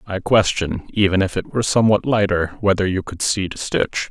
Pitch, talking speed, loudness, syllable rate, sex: 100 Hz, 205 wpm, -19 LUFS, 5.4 syllables/s, male